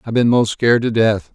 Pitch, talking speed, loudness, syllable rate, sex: 115 Hz, 270 wpm, -15 LUFS, 5.6 syllables/s, male